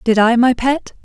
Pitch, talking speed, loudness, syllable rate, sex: 245 Hz, 230 wpm, -14 LUFS, 4.5 syllables/s, female